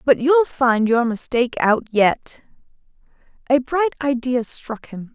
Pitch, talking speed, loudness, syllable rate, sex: 250 Hz, 140 wpm, -19 LUFS, 3.9 syllables/s, female